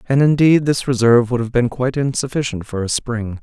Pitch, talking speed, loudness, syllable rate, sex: 125 Hz, 210 wpm, -17 LUFS, 5.7 syllables/s, male